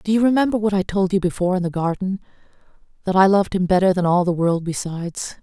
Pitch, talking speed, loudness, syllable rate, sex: 185 Hz, 230 wpm, -19 LUFS, 6.7 syllables/s, female